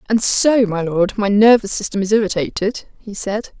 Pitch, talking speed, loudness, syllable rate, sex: 210 Hz, 185 wpm, -16 LUFS, 4.9 syllables/s, female